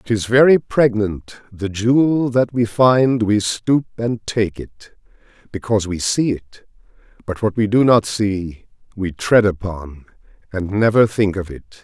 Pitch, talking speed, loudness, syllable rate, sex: 110 Hz, 155 wpm, -17 LUFS, 4.1 syllables/s, male